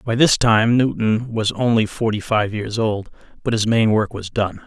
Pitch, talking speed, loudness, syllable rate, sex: 110 Hz, 205 wpm, -19 LUFS, 4.4 syllables/s, male